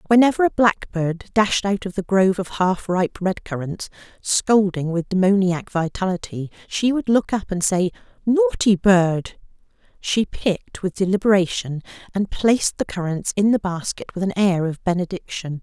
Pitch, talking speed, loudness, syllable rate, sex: 190 Hz, 155 wpm, -20 LUFS, 4.7 syllables/s, female